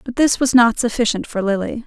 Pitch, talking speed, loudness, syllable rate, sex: 230 Hz, 225 wpm, -17 LUFS, 5.1 syllables/s, female